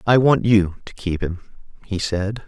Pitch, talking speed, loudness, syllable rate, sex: 100 Hz, 195 wpm, -20 LUFS, 4.3 syllables/s, male